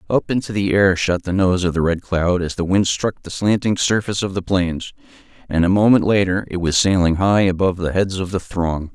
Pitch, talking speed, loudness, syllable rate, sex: 95 Hz, 235 wpm, -18 LUFS, 5.5 syllables/s, male